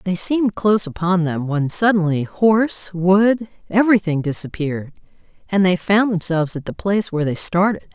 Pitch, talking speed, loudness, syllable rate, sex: 185 Hz, 160 wpm, -18 LUFS, 5.4 syllables/s, female